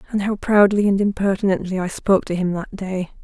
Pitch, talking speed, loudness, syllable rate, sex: 195 Hz, 205 wpm, -19 LUFS, 5.8 syllables/s, female